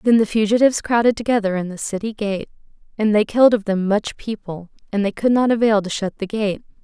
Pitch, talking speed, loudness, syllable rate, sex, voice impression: 210 Hz, 220 wpm, -19 LUFS, 6.0 syllables/s, female, very feminine, adult-like, thin, relaxed, slightly weak, bright, soft, clear, fluent, cute, intellectual, very refreshing, sincere, calm, mature, friendly, reassuring, unique, very elegant, slightly wild